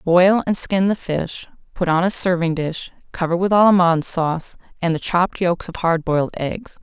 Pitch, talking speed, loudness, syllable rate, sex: 175 Hz, 195 wpm, -19 LUFS, 5.1 syllables/s, female